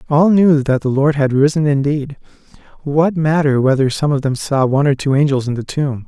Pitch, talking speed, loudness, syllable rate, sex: 145 Hz, 215 wpm, -15 LUFS, 5.4 syllables/s, male